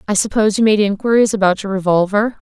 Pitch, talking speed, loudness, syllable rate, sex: 205 Hz, 195 wpm, -15 LUFS, 6.6 syllables/s, female